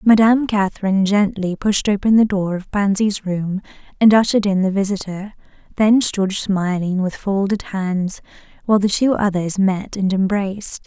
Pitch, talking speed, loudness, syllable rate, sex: 200 Hz, 155 wpm, -18 LUFS, 4.9 syllables/s, female